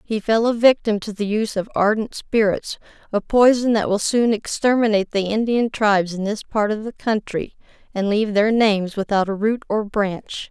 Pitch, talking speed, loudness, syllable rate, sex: 215 Hz, 190 wpm, -20 LUFS, 5.1 syllables/s, female